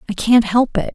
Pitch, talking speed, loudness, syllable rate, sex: 225 Hz, 255 wpm, -15 LUFS, 5.3 syllables/s, female